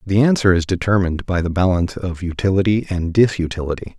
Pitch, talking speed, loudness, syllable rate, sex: 95 Hz, 165 wpm, -18 LUFS, 6.2 syllables/s, male